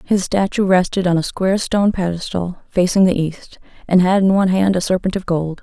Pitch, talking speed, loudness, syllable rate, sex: 185 Hz, 215 wpm, -17 LUFS, 5.6 syllables/s, female